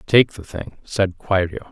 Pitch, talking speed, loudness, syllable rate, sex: 95 Hz, 175 wpm, -20 LUFS, 4.0 syllables/s, male